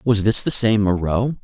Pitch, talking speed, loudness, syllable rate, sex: 110 Hz, 210 wpm, -18 LUFS, 4.4 syllables/s, male